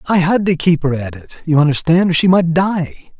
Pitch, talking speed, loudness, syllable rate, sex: 165 Hz, 245 wpm, -14 LUFS, 5.2 syllables/s, male